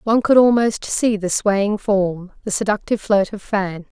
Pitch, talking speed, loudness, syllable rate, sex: 205 Hz, 180 wpm, -18 LUFS, 4.6 syllables/s, female